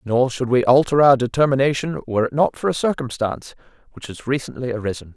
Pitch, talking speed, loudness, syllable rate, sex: 130 Hz, 185 wpm, -19 LUFS, 6.3 syllables/s, male